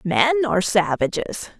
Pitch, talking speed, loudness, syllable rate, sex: 220 Hz, 115 wpm, -20 LUFS, 4.8 syllables/s, female